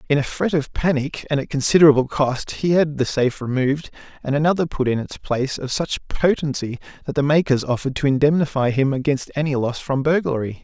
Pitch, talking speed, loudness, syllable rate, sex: 140 Hz, 195 wpm, -20 LUFS, 6.0 syllables/s, male